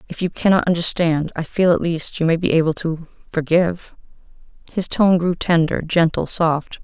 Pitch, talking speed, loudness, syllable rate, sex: 170 Hz, 165 wpm, -19 LUFS, 5.0 syllables/s, female